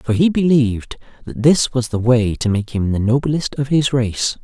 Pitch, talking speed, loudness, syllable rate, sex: 125 Hz, 215 wpm, -17 LUFS, 4.6 syllables/s, male